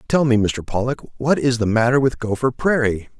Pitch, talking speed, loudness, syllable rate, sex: 120 Hz, 205 wpm, -19 LUFS, 5.2 syllables/s, male